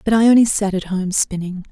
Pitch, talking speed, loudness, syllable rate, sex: 200 Hz, 210 wpm, -17 LUFS, 4.4 syllables/s, female